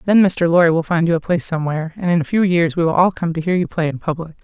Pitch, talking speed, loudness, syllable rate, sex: 170 Hz, 325 wpm, -17 LUFS, 7.1 syllables/s, female